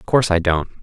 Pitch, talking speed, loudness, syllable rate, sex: 95 Hz, 290 wpm, -18 LUFS, 7.5 syllables/s, male